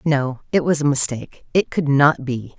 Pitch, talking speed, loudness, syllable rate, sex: 140 Hz, 210 wpm, -19 LUFS, 4.9 syllables/s, female